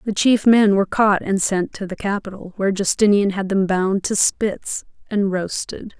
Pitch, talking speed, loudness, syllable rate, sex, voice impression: 200 Hz, 190 wpm, -19 LUFS, 4.7 syllables/s, female, feminine, adult-like, powerful, fluent, raspy, intellectual, calm, friendly, lively, strict, sharp